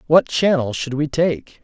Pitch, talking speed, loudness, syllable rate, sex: 140 Hz, 185 wpm, -19 LUFS, 4.1 syllables/s, male